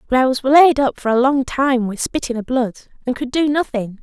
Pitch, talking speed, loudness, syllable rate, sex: 255 Hz, 255 wpm, -17 LUFS, 5.3 syllables/s, female